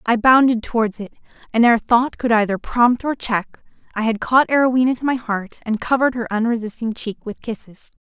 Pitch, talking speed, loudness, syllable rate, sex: 235 Hz, 195 wpm, -18 LUFS, 5.4 syllables/s, female